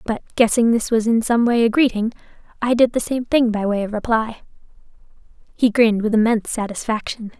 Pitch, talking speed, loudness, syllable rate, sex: 225 Hz, 185 wpm, -18 LUFS, 5.8 syllables/s, female